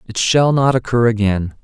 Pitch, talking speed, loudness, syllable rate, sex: 115 Hz, 185 wpm, -15 LUFS, 4.9 syllables/s, male